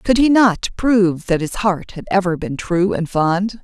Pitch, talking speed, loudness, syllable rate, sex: 190 Hz, 215 wpm, -17 LUFS, 4.3 syllables/s, female